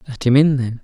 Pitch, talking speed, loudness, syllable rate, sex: 130 Hz, 290 wpm, -15 LUFS, 6.2 syllables/s, male